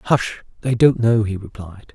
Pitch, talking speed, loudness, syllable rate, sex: 110 Hz, 185 wpm, -19 LUFS, 4.1 syllables/s, male